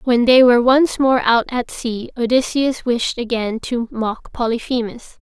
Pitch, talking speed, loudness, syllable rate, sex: 245 Hz, 160 wpm, -17 LUFS, 4.2 syllables/s, female